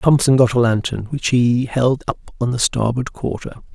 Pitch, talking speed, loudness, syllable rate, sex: 120 Hz, 190 wpm, -18 LUFS, 4.9 syllables/s, male